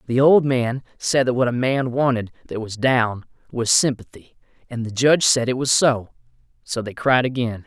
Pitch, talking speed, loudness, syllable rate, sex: 125 Hz, 195 wpm, -20 LUFS, 4.9 syllables/s, male